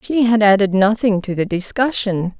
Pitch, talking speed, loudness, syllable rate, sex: 210 Hz, 175 wpm, -16 LUFS, 4.8 syllables/s, female